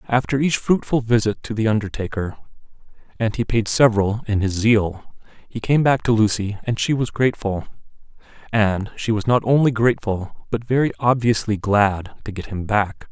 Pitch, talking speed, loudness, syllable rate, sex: 110 Hz, 170 wpm, -20 LUFS, 5.0 syllables/s, male